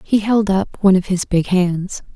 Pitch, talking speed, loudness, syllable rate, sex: 190 Hz, 225 wpm, -17 LUFS, 4.6 syllables/s, female